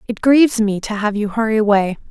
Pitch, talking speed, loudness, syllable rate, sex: 215 Hz, 230 wpm, -16 LUFS, 6.0 syllables/s, female